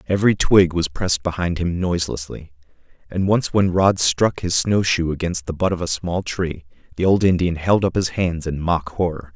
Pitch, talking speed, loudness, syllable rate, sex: 85 Hz, 205 wpm, -20 LUFS, 5.0 syllables/s, male